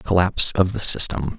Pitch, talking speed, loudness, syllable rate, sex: 90 Hz, 175 wpm, -17 LUFS, 5.2 syllables/s, male